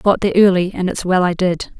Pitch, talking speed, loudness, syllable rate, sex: 185 Hz, 300 wpm, -16 LUFS, 6.7 syllables/s, female